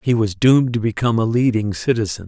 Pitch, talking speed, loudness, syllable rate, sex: 115 Hz, 210 wpm, -18 LUFS, 6.5 syllables/s, male